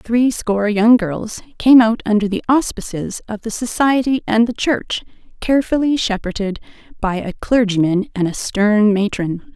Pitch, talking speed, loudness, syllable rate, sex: 220 Hz, 145 wpm, -17 LUFS, 4.6 syllables/s, female